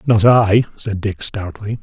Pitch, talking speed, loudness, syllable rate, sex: 105 Hz, 165 wpm, -16 LUFS, 3.9 syllables/s, male